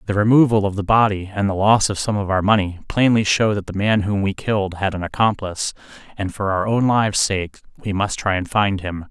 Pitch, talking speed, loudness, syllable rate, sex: 100 Hz, 235 wpm, -19 LUFS, 5.7 syllables/s, male